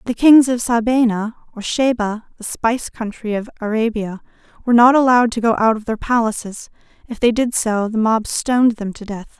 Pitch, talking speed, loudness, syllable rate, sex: 230 Hz, 190 wpm, -17 LUFS, 5.2 syllables/s, female